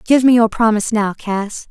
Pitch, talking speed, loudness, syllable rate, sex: 220 Hz, 210 wpm, -15 LUFS, 5.1 syllables/s, female